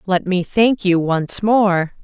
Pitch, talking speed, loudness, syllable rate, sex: 190 Hz, 175 wpm, -16 LUFS, 3.3 syllables/s, female